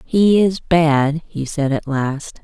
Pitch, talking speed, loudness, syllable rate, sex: 155 Hz, 170 wpm, -17 LUFS, 3.1 syllables/s, female